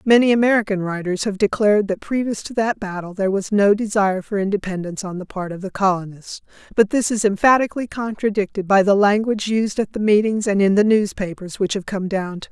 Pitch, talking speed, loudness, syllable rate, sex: 205 Hz, 210 wpm, -19 LUFS, 6.1 syllables/s, female